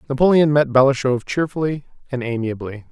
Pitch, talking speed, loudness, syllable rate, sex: 135 Hz, 125 wpm, -18 LUFS, 5.9 syllables/s, male